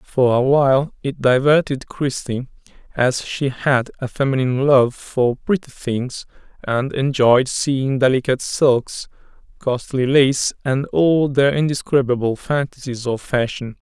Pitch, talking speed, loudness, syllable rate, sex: 135 Hz, 125 wpm, -18 LUFS, 4.1 syllables/s, male